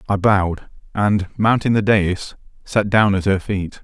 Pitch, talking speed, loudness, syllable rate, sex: 100 Hz, 170 wpm, -18 LUFS, 4.2 syllables/s, male